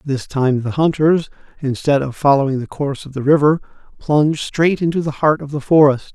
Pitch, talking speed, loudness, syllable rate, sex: 145 Hz, 195 wpm, -17 LUFS, 5.4 syllables/s, male